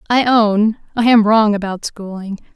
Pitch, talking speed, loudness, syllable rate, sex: 215 Hz, 165 wpm, -15 LUFS, 4.3 syllables/s, female